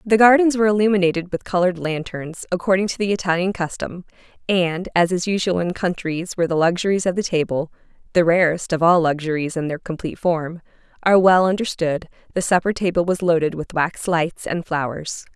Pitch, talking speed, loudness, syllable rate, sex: 175 Hz, 170 wpm, -20 LUFS, 5.8 syllables/s, female